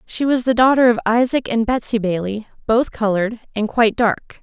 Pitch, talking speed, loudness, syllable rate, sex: 230 Hz, 190 wpm, -18 LUFS, 5.3 syllables/s, female